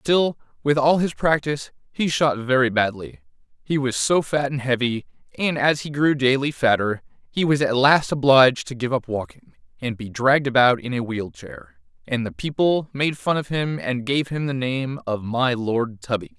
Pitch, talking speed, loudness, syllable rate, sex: 135 Hz, 200 wpm, -21 LUFS, 4.8 syllables/s, male